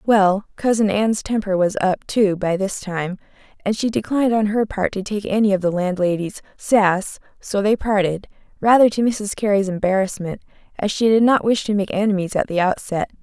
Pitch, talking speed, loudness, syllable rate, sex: 200 Hz, 190 wpm, -19 LUFS, 5.1 syllables/s, female